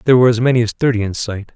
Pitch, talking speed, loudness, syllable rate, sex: 115 Hz, 310 wpm, -15 LUFS, 8.6 syllables/s, male